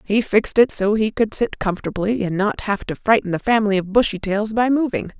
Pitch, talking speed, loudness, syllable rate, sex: 210 Hz, 230 wpm, -19 LUFS, 5.8 syllables/s, female